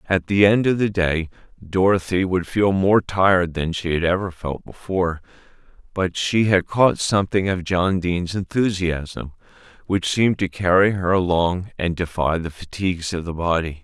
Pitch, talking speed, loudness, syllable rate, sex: 90 Hz, 170 wpm, -20 LUFS, 4.7 syllables/s, male